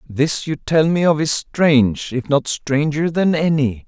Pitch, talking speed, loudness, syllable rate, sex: 145 Hz, 170 wpm, -17 LUFS, 4.0 syllables/s, male